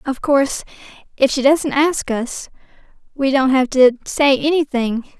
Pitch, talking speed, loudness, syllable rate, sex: 270 Hz, 150 wpm, -17 LUFS, 4.3 syllables/s, female